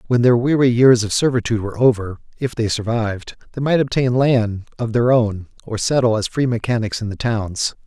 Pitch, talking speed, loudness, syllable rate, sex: 115 Hz, 200 wpm, -18 LUFS, 5.5 syllables/s, male